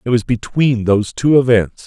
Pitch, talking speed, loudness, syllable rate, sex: 115 Hz, 195 wpm, -15 LUFS, 5.1 syllables/s, male